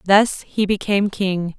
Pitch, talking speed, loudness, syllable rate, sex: 195 Hz, 150 wpm, -19 LUFS, 4.4 syllables/s, female